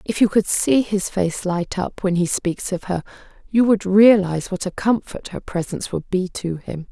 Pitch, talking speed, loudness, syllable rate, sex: 190 Hz, 215 wpm, -20 LUFS, 4.8 syllables/s, female